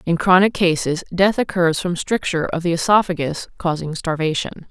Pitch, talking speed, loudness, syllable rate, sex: 175 Hz, 155 wpm, -19 LUFS, 5.2 syllables/s, female